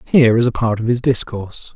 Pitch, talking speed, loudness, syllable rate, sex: 115 Hz, 240 wpm, -16 LUFS, 6.1 syllables/s, male